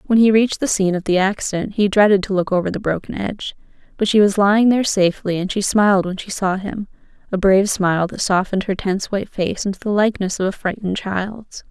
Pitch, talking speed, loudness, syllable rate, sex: 195 Hz, 225 wpm, -18 LUFS, 6.5 syllables/s, female